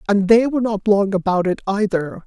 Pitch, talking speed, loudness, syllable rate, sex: 200 Hz, 210 wpm, -18 LUFS, 5.4 syllables/s, male